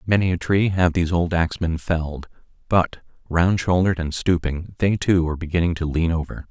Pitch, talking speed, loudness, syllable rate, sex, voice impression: 85 Hz, 185 wpm, -21 LUFS, 5.6 syllables/s, male, very masculine, adult-like, thick, cool, sincere, calm, slightly mature